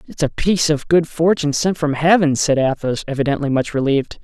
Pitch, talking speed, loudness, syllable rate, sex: 150 Hz, 200 wpm, -17 LUFS, 5.9 syllables/s, male